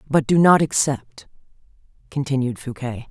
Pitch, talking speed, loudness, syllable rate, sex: 135 Hz, 115 wpm, -20 LUFS, 4.7 syllables/s, female